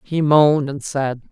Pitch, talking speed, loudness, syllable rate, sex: 145 Hz, 180 wpm, -17 LUFS, 4.3 syllables/s, female